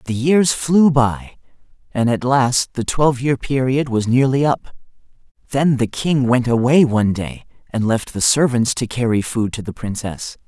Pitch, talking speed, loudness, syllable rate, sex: 125 Hz, 180 wpm, -17 LUFS, 4.5 syllables/s, male